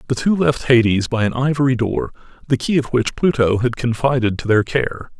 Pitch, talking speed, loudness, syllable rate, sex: 125 Hz, 210 wpm, -18 LUFS, 5.3 syllables/s, male